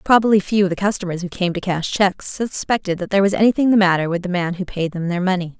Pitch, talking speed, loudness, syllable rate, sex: 190 Hz, 270 wpm, -19 LUFS, 6.7 syllables/s, female